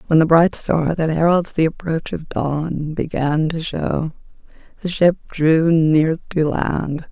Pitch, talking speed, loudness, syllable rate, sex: 160 Hz, 160 wpm, -18 LUFS, 3.7 syllables/s, female